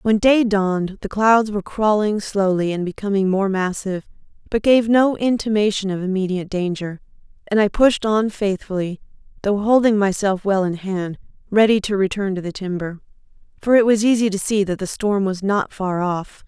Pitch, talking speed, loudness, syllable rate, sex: 200 Hz, 180 wpm, -19 LUFS, 5.1 syllables/s, female